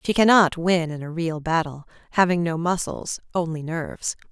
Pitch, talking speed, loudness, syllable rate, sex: 170 Hz, 165 wpm, -23 LUFS, 5.0 syllables/s, female